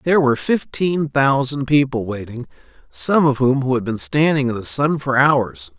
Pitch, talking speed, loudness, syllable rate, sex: 140 Hz, 175 wpm, -18 LUFS, 4.6 syllables/s, male